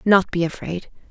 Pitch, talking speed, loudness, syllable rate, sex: 180 Hz, 165 wpm, -22 LUFS, 4.8 syllables/s, female